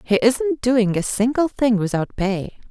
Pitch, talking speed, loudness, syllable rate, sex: 230 Hz, 175 wpm, -20 LUFS, 4.2 syllables/s, female